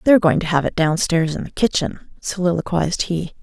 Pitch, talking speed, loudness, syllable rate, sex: 170 Hz, 195 wpm, -19 LUFS, 5.8 syllables/s, female